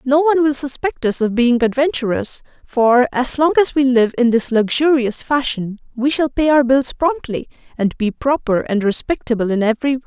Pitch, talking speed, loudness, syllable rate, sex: 260 Hz, 190 wpm, -17 LUFS, 5.1 syllables/s, female